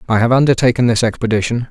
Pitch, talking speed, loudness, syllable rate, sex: 120 Hz, 175 wpm, -14 LUFS, 7.2 syllables/s, male